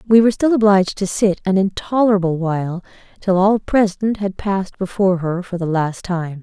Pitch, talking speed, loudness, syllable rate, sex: 190 Hz, 185 wpm, -18 LUFS, 5.5 syllables/s, female